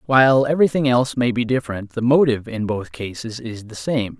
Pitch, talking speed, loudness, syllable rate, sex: 125 Hz, 200 wpm, -19 LUFS, 5.9 syllables/s, male